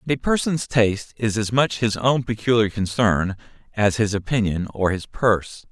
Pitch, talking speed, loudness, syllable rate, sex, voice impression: 110 Hz, 180 wpm, -21 LUFS, 4.9 syllables/s, male, masculine, adult-like, tensed, bright, clear, fluent, intellectual, slightly refreshing, calm, wild, slightly lively, slightly strict